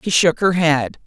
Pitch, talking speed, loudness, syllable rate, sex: 170 Hz, 225 wpm, -16 LUFS, 4.4 syllables/s, female